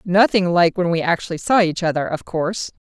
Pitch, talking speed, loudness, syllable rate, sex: 175 Hz, 210 wpm, -19 LUFS, 5.7 syllables/s, female